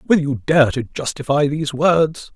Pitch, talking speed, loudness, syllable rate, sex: 145 Hz, 180 wpm, -18 LUFS, 4.4 syllables/s, male